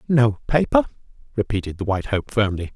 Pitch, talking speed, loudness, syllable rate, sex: 115 Hz, 155 wpm, -22 LUFS, 5.8 syllables/s, male